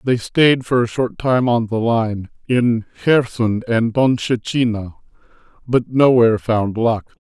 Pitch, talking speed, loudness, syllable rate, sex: 115 Hz, 140 wpm, -17 LUFS, 3.8 syllables/s, male